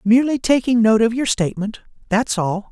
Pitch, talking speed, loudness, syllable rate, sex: 225 Hz, 175 wpm, -18 LUFS, 5.8 syllables/s, male